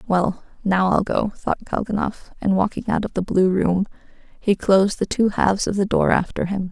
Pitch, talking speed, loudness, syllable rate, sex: 195 Hz, 205 wpm, -21 LUFS, 5.1 syllables/s, female